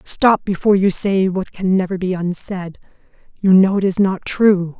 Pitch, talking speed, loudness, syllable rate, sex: 190 Hz, 190 wpm, -16 LUFS, 4.6 syllables/s, female